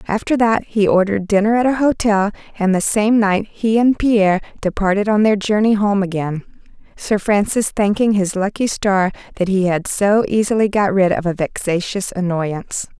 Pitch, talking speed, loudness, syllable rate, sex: 205 Hz, 175 wpm, -17 LUFS, 5.0 syllables/s, female